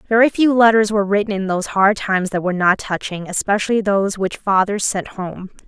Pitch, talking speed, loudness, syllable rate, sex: 200 Hz, 200 wpm, -17 LUFS, 6.0 syllables/s, female